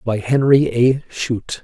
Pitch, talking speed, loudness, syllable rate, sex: 120 Hz, 145 wpm, -17 LUFS, 4.1 syllables/s, male